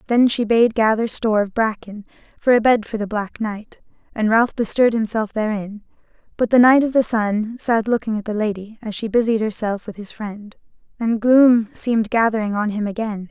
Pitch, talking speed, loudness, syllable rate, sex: 220 Hz, 200 wpm, -19 LUFS, 5.2 syllables/s, female